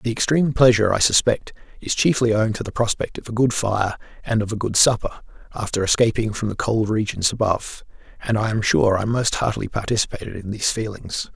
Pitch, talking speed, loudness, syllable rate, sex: 110 Hz, 200 wpm, -20 LUFS, 6.1 syllables/s, male